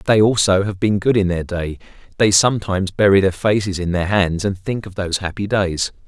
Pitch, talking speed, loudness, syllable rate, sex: 95 Hz, 215 wpm, -18 LUFS, 5.6 syllables/s, male